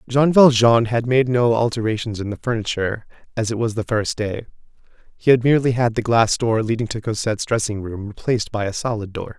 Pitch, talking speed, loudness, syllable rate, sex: 115 Hz, 205 wpm, -19 LUFS, 5.9 syllables/s, male